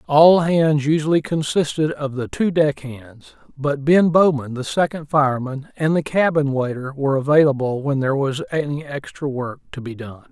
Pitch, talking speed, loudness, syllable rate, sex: 145 Hz, 175 wpm, -19 LUFS, 4.9 syllables/s, male